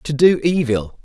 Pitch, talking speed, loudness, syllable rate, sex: 145 Hz, 175 wpm, -17 LUFS, 4.1 syllables/s, male